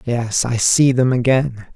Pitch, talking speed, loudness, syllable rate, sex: 125 Hz, 170 wpm, -16 LUFS, 3.8 syllables/s, male